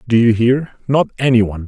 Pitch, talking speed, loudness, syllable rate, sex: 120 Hz, 215 wpm, -15 LUFS, 5.9 syllables/s, male